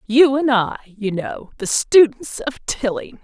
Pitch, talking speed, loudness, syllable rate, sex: 235 Hz, 165 wpm, -18 LUFS, 3.7 syllables/s, female